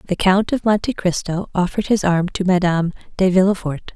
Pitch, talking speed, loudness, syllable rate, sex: 185 Hz, 180 wpm, -18 LUFS, 5.8 syllables/s, female